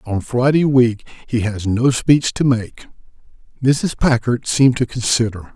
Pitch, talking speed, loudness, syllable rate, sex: 120 Hz, 150 wpm, -17 LUFS, 4.3 syllables/s, male